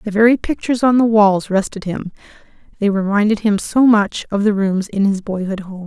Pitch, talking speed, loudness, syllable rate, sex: 205 Hz, 205 wpm, -16 LUFS, 5.3 syllables/s, female